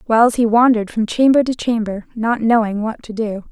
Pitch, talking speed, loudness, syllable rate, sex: 225 Hz, 205 wpm, -16 LUFS, 5.3 syllables/s, female